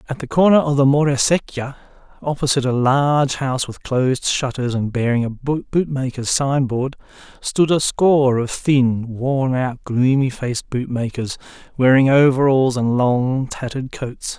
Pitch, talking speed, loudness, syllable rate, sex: 130 Hz, 140 wpm, -18 LUFS, 4.6 syllables/s, male